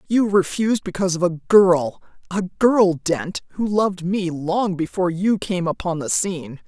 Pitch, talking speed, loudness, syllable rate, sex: 185 Hz, 160 wpm, -20 LUFS, 4.7 syllables/s, female